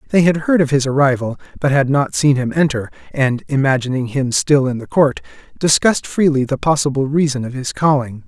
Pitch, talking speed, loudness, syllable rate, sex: 140 Hz, 195 wpm, -16 LUFS, 5.6 syllables/s, male